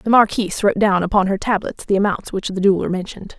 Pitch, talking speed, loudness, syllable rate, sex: 200 Hz, 230 wpm, -18 LUFS, 6.9 syllables/s, female